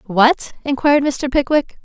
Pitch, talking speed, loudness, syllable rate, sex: 270 Hz, 130 wpm, -16 LUFS, 4.7 syllables/s, female